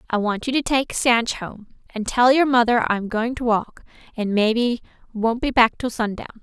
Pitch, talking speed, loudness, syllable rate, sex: 235 Hz, 215 wpm, -20 LUFS, 4.7 syllables/s, female